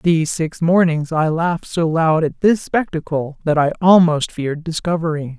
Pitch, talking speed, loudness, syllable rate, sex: 160 Hz, 165 wpm, -17 LUFS, 4.8 syllables/s, female